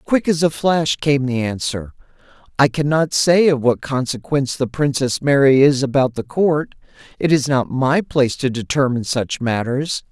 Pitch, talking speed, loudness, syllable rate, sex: 135 Hz, 180 wpm, -17 LUFS, 4.7 syllables/s, male